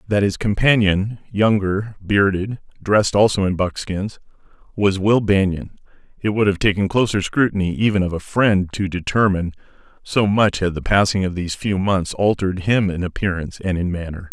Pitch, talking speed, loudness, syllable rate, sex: 100 Hz, 170 wpm, -19 LUFS, 5.2 syllables/s, male